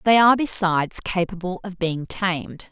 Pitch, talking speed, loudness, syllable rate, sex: 185 Hz, 155 wpm, -21 LUFS, 5.2 syllables/s, female